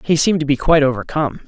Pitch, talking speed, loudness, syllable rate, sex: 145 Hz, 245 wpm, -16 LUFS, 8.2 syllables/s, male